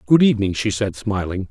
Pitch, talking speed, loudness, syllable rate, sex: 105 Hz, 200 wpm, -19 LUFS, 5.9 syllables/s, male